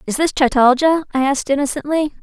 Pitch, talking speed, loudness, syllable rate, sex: 280 Hz, 160 wpm, -16 LUFS, 6.5 syllables/s, female